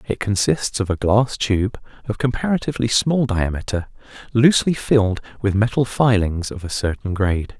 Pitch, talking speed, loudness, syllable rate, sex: 110 Hz, 150 wpm, -20 LUFS, 5.2 syllables/s, male